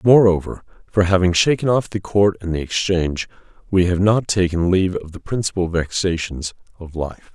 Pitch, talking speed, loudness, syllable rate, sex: 95 Hz, 170 wpm, -19 LUFS, 5.2 syllables/s, male